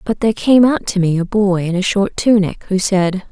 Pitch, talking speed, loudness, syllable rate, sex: 200 Hz, 255 wpm, -15 LUFS, 5.1 syllables/s, female